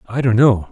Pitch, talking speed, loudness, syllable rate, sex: 115 Hz, 255 wpm, -15 LUFS, 5.3 syllables/s, male